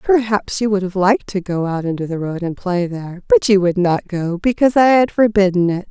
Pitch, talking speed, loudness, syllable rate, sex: 190 Hz, 245 wpm, -16 LUFS, 5.6 syllables/s, female